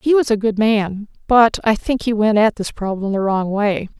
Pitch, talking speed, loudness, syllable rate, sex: 215 Hz, 240 wpm, -17 LUFS, 4.7 syllables/s, female